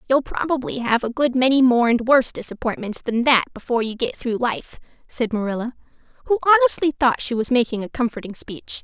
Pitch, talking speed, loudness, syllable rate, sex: 245 Hz, 190 wpm, -20 LUFS, 6.0 syllables/s, female